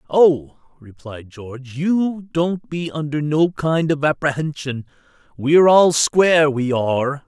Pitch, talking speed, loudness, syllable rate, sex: 150 Hz, 130 wpm, -18 LUFS, 3.9 syllables/s, male